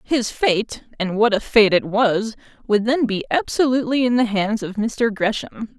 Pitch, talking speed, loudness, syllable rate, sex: 225 Hz, 165 wpm, -19 LUFS, 4.5 syllables/s, female